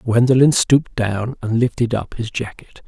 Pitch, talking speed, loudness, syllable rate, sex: 120 Hz, 165 wpm, -18 LUFS, 4.7 syllables/s, male